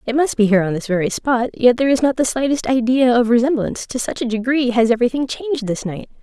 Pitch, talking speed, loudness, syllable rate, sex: 245 Hz, 250 wpm, -17 LUFS, 6.6 syllables/s, female